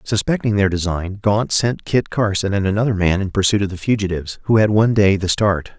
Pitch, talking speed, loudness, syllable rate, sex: 100 Hz, 220 wpm, -18 LUFS, 5.8 syllables/s, male